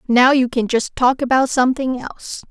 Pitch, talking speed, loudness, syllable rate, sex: 255 Hz, 190 wpm, -17 LUFS, 5.3 syllables/s, female